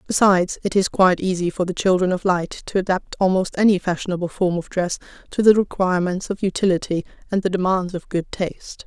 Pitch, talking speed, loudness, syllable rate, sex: 185 Hz, 195 wpm, -20 LUFS, 6.0 syllables/s, female